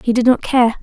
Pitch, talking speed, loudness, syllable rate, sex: 240 Hz, 290 wpm, -15 LUFS, 6.0 syllables/s, female